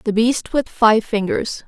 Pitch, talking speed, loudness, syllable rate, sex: 235 Hz, 180 wpm, -18 LUFS, 3.9 syllables/s, female